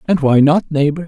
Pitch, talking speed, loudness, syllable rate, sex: 155 Hz, 225 wpm, -14 LUFS, 5.2 syllables/s, male